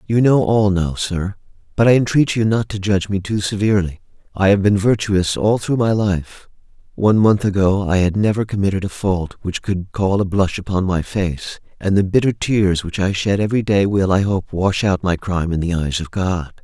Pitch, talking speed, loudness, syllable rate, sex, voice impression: 100 Hz, 220 wpm, -18 LUFS, 5.2 syllables/s, male, very masculine, very adult-like, slightly middle-aged, very thick, slightly relaxed, slightly weak, slightly dark, slightly soft, muffled, fluent, cool, very intellectual, slightly refreshing, very sincere, very calm, mature, friendly, reassuring, unique, wild, sweet, slightly lively, very kind